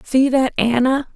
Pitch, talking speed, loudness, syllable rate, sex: 260 Hz, 155 wpm, -17 LUFS, 4.1 syllables/s, female